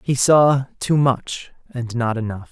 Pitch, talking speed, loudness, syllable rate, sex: 130 Hz, 165 wpm, -18 LUFS, 3.8 syllables/s, male